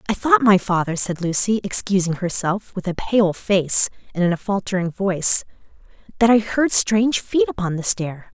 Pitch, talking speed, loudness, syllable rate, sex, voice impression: 195 Hz, 180 wpm, -19 LUFS, 5.0 syllables/s, female, very feminine, adult-like, slightly middle-aged, very thin, very tensed, very powerful, very bright, hard, very clear, very fluent, cool, intellectual, very refreshing, sincere, slightly calm, slightly friendly, slightly reassuring, very unique, elegant, slightly sweet, very lively, strict, intense, sharp